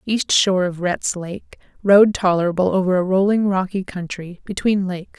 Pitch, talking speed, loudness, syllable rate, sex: 190 Hz, 150 wpm, -19 LUFS, 5.0 syllables/s, female